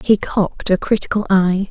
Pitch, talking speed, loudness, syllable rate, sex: 195 Hz, 175 wpm, -17 LUFS, 5.1 syllables/s, female